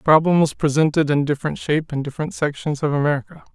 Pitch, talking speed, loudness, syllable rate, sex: 150 Hz, 205 wpm, -20 LUFS, 7.0 syllables/s, male